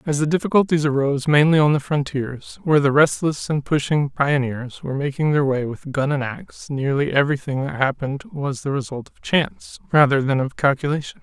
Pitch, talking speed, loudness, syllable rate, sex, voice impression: 145 Hz, 185 wpm, -20 LUFS, 5.6 syllables/s, male, slightly masculine, adult-like, slightly weak, slightly calm, slightly unique, kind